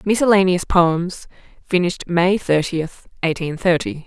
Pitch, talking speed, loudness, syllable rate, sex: 180 Hz, 105 wpm, -18 LUFS, 4.3 syllables/s, female